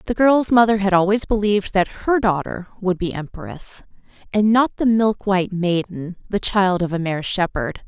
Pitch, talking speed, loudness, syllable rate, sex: 195 Hz, 175 wpm, -19 LUFS, 4.9 syllables/s, female